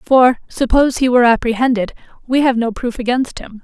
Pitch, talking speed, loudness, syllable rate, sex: 245 Hz, 180 wpm, -15 LUFS, 5.8 syllables/s, female